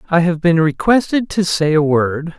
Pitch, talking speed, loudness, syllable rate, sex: 170 Hz, 200 wpm, -15 LUFS, 4.6 syllables/s, male